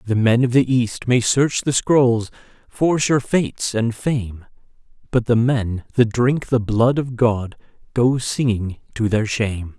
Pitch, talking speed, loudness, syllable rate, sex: 120 Hz, 170 wpm, -19 LUFS, 3.9 syllables/s, male